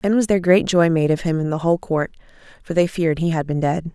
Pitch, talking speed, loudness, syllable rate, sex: 170 Hz, 290 wpm, -19 LUFS, 6.4 syllables/s, female